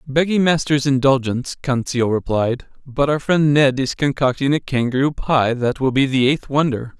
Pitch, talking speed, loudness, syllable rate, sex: 135 Hz, 170 wpm, -18 LUFS, 4.8 syllables/s, male